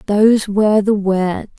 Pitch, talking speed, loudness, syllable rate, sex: 205 Hz, 150 wpm, -15 LUFS, 4.5 syllables/s, female